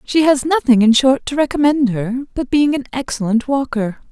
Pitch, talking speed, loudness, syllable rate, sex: 260 Hz, 190 wpm, -16 LUFS, 5.2 syllables/s, female